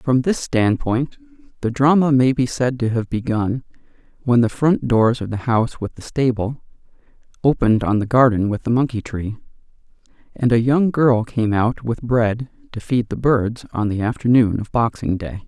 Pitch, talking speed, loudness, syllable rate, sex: 120 Hz, 180 wpm, -19 LUFS, 4.6 syllables/s, male